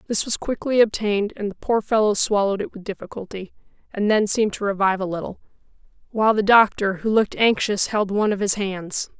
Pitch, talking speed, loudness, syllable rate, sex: 205 Hz, 195 wpm, -21 LUFS, 6.2 syllables/s, female